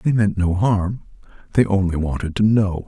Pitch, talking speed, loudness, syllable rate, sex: 100 Hz, 190 wpm, -19 LUFS, 4.8 syllables/s, male